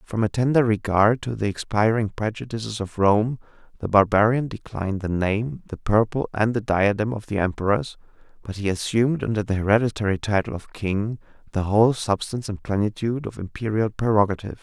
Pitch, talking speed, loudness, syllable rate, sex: 110 Hz, 165 wpm, -23 LUFS, 5.7 syllables/s, male